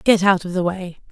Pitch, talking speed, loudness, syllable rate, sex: 185 Hz, 270 wpm, -19 LUFS, 5.2 syllables/s, female